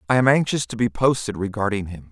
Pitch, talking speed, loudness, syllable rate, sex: 110 Hz, 225 wpm, -21 LUFS, 6.2 syllables/s, male